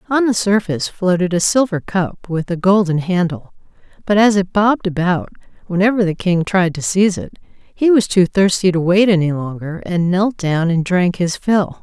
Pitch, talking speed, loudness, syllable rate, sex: 185 Hz, 195 wpm, -16 LUFS, 4.9 syllables/s, female